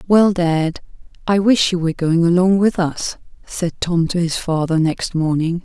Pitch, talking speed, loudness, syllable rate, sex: 175 Hz, 180 wpm, -17 LUFS, 4.5 syllables/s, female